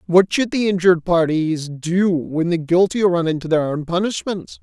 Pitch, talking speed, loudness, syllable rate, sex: 175 Hz, 180 wpm, -18 LUFS, 4.7 syllables/s, male